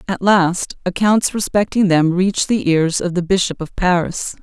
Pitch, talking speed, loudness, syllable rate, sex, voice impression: 185 Hz, 175 wpm, -17 LUFS, 4.6 syllables/s, female, feminine, adult-like, tensed, powerful, slightly hard, clear, intellectual, calm, reassuring, elegant, lively, slightly sharp